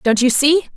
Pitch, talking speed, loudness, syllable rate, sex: 275 Hz, 235 wpm, -14 LUFS, 4.4 syllables/s, female